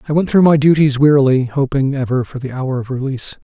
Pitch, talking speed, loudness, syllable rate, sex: 135 Hz, 220 wpm, -15 LUFS, 6.1 syllables/s, male